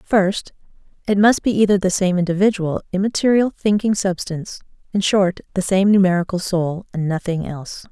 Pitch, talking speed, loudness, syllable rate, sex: 190 Hz, 150 wpm, -18 LUFS, 5.3 syllables/s, female